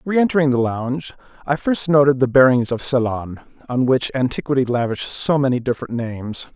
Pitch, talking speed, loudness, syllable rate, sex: 130 Hz, 165 wpm, -19 LUFS, 5.7 syllables/s, male